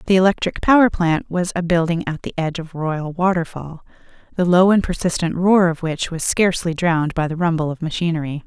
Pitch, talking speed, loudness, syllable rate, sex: 170 Hz, 200 wpm, -19 LUFS, 5.7 syllables/s, female